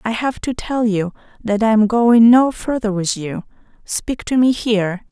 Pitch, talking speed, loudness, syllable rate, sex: 220 Hz, 200 wpm, -17 LUFS, 4.5 syllables/s, female